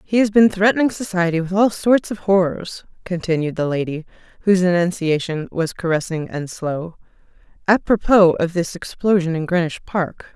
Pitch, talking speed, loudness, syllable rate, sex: 180 Hz, 150 wpm, -19 LUFS, 5.2 syllables/s, female